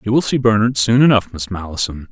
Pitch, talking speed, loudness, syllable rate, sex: 105 Hz, 225 wpm, -16 LUFS, 6.0 syllables/s, male